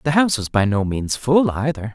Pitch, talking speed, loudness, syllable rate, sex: 125 Hz, 245 wpm, -19 LUFS, 5.5 syllables/s, male